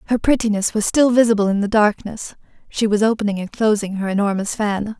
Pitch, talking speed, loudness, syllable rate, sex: 210 Hz, 190 wpm, -18 LUFS, 5.8 syllables/s, female